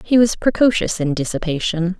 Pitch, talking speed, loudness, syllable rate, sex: 190 Hz, 150 wpm, -18 LUFS, 5.3 syllables/s, female